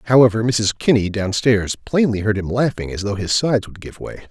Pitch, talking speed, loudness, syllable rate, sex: 110 Hz, 225 wpm, -18 LUFS, 5.5 syllables/s, male